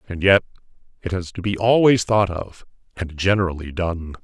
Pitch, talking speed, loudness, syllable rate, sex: 95 Hz, 170 wpm, -20 LUFS, 5.1 syllables/s, male